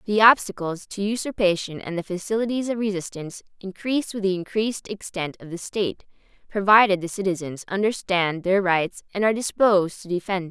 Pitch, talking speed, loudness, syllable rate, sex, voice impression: 195 Hz, 165 wpm, -23 LUFS, 5.8 syllables/s, female, feminine, adult-like, slightly bright, clear, fluent, intellectual, slightly friendly, unique, lively, slightly strict, slightly sharp